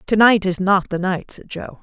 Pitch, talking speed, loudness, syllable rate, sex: 190 Hz, 265 wpm, -17 LUFS, 4.7 syllables/s, female